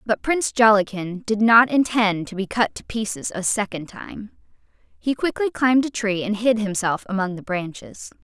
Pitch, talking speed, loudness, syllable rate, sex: 215 Hz, 180 wpm, -21 LUFS, 4.9 syllables/s, female